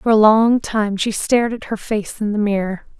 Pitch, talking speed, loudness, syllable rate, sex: 215 Hz, 240 wpm, -18 LUFS, 4.9 syllables/s, female